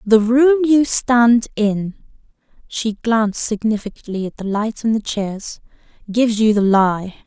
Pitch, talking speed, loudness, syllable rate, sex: 220 Hz, 130 wpm, -17 LUFS, 4.2 syllables/s, female